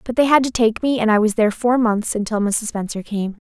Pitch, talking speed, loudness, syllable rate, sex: 225 Hz, 275 wpm, -18 LUFS, 5.7 syllables/s, female